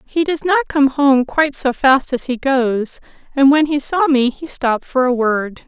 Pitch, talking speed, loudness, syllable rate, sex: 270 Hz, 220 wpm, -16 LUFS, 4.5 syllables/s, female